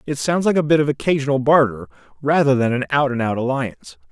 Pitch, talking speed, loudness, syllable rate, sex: 135 Hz, 220 wpm, -18 LUFS, 6.3 syllables/s, male